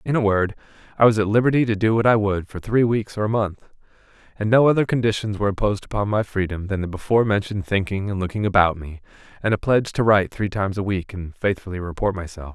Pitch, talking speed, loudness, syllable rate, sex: 105 Hz, 235 wpm, -21 LUFS, 6.7 syllables/s, male